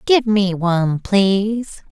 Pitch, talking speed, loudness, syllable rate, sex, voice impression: 200 Hz, 125 wpm, -17 LUFS, 3.5 syllables/s, female, feminine, adult-like, tensed, bright, halting, friendly, unique, slightly intense, slightly sharp